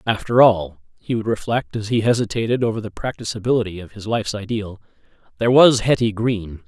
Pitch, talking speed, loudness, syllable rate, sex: 110 Hz, 170 wpm, -19 LUFS, 5.9 syllables/s, male